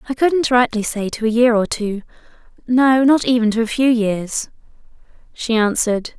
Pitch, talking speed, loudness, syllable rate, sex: 235 Hz, 175 wpm, -17 LUFS, 4.9 syllables/s, female